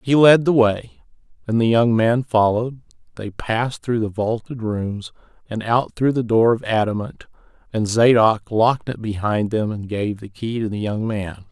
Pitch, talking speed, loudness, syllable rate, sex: 110 Hz, 190 wpm, -19 LUFS, 4.6 syllables/s, male